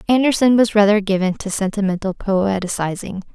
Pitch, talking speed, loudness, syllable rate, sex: 200 Hz, 125 wpm, -18 LUFS, 5.2 syllables/s, female